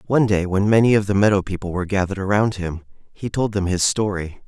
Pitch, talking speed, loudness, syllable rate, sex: 100 Hz, 230 wpm, -20 LUFS, 6.5 syllables/s, male